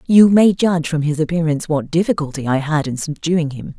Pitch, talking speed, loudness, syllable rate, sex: 160 Hz, 205 wpm, -17 LUFS, 5.7 syllables/s, female